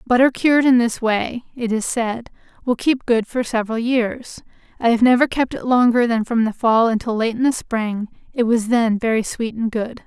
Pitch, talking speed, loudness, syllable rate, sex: 235 Hz, 215 wpm, -19 LUFS, 5.0 syllables/s, female